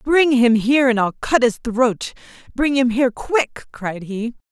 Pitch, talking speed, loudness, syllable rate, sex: 245 Hz, 185 wpm, -18 LUFS, 4.4 syllables/s, female